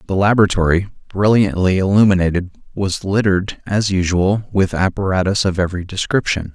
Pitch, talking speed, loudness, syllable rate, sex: 95 Hz, 120 wpm, -17 LUFS, 5.7 syllables/s, male